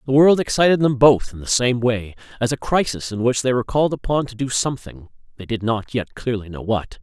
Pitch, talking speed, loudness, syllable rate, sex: 125 Hz, 230 wpm, -19 LUFS, 5.9 syllables/s, male